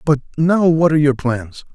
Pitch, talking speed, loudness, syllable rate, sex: 150 Hz, 205 wpm, -16 LUFS, 5.0 syllables/s, male